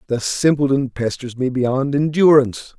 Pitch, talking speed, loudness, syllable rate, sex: 135 Hz, 130 wpm, -17 LUFS, 4.7 syllables/s, male